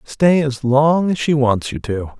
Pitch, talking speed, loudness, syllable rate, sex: 140 Hz, 220 wpm, -16 LUFS, 3.9 syllables/s, male